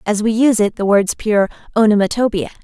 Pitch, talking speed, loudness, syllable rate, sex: 215 Hz, 185 wpm, -15 LUFS, 6.1 syllables/s, female